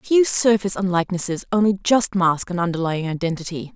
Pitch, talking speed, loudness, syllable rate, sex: 185 Hz, 160 wpm, -20 LUFS, 6.3 syllables/s, female